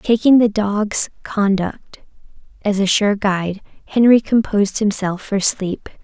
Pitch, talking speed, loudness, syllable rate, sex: 205 Hz, 130 wpm, -17 LUFS, 4.1 syllables/s, female